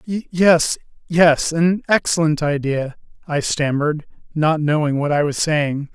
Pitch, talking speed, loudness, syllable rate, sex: 155 Hz, 130 wpm, -18 LUFS, 3.9 syllables/s, male